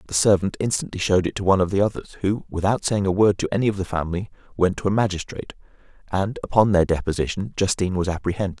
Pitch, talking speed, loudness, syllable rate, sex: 95 Hz, 215 wpm, -22 LUFS, 7.1 syllables/s, male